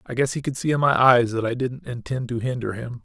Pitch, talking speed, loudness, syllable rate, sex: 125 Hz, 295 wpm, -22 LUFS, 5.8 syllables/s, male